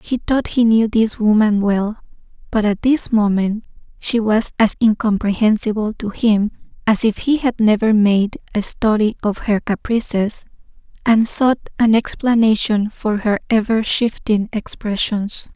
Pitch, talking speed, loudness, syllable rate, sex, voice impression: 215 Hz, 145 wpm, -17 LUFS, 4.3 syllables/s, female, feminine, adult-like, relaxed, weak, soft, raspy, calm, reassuring, elegant, kind, modest